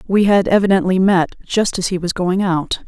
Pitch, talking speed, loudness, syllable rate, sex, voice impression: 190 Hz, 210 wpm, -16 LUFS, 4.9 syllables/s, female, very feminine, adult-like, slightly middle-aged, thin, tensed, powerful, slightly bright, hard, clear, slightly fluent, slightly cool, very intellectual, slightly refreshing, sincere, very calm, friendly, reassuring, elegant, slightly wild, slightly lively, slightly strict, slightly sharp